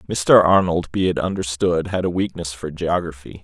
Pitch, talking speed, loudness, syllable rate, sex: 90 Hz, 175 wpm, -19 LUFS, 5.0 syllables/s, male